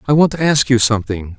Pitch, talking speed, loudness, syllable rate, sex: 120 Hz, 260 wpm, -14 LUFS, 6.2 syllables/s, male